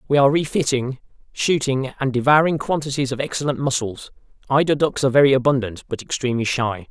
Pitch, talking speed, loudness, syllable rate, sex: 135 Hz, 155 wpm, -20 LUFS, 6.2 syllables/s, male